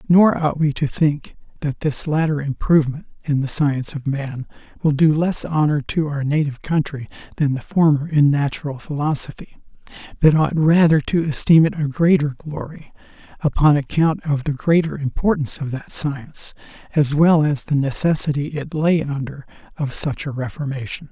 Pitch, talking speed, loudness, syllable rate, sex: 150 Hz, 165 wpm, -19 LUFS, 5.0 syllables/s, male